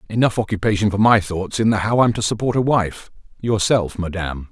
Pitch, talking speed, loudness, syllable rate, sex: 105 Hz, 185 wpm, -19 LUFS, 5.7 syllables/s, male